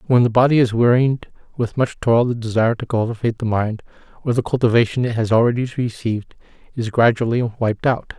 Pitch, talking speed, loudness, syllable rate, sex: 115 Hz, 185 wpm, -19 LUFS, 6.1 syllables/s, male